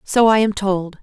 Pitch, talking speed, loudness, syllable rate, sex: 200 Hz, 235 wpm, -16 LUFS, 4.4 syllables/s, female